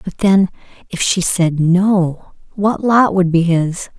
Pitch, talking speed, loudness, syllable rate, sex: 185 Hz, 165 wpm, -15 LUFS, 3.4 syllables/s, female